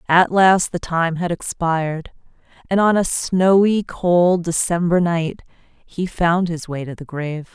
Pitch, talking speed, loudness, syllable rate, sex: 175 Hz, 160 wpm, -18 LUFS, 4.0 syllables/s, female